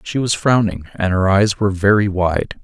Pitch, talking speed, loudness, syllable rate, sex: 100 Hz, 205 wpm, -16 LUFS, 4.9 syllables/s, male